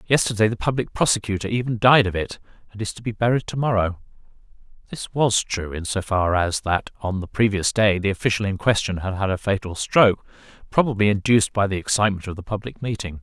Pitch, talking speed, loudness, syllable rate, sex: 105 Hz, 200 wpm, -21 LUFS, 2.3 syllables/s, male